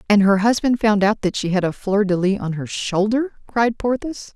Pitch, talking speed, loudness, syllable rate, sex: 210 Hz, 235 wpm, -19 LUFS, 4.9 syllables/s, female